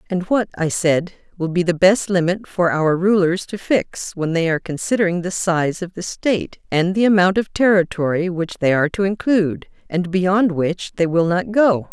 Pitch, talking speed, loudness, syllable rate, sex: 180 Hz, 200 wpm, -18 LUFS, 5.0 syllables/s, female